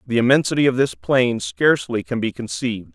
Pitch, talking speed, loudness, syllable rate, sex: 120 Hz, 185 wpm, -19 LUFS, 5.7 syllables/s, male